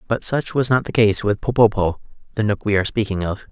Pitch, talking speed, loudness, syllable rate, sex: 110 Hz, 240 wpm, -19 LUFS, 6.0 syllables/s, male